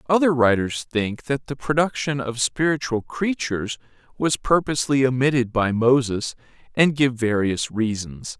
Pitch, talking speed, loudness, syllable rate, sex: 130 Hz, 130 wpm, -22 LUFS, 4.6 syllables/s, male